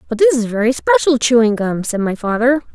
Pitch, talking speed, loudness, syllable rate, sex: 245 Hz, 220 wpm, -15 LUFS, 5.6 syllables/s, female